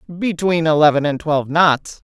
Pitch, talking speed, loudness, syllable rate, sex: 160 Hz, 140 wpm, -16 LUFS, 4.8 syllables/s, female